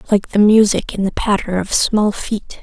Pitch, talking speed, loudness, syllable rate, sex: 205 Hz, 205 wpm, -16 LUFS, 4.6 syllables/s, female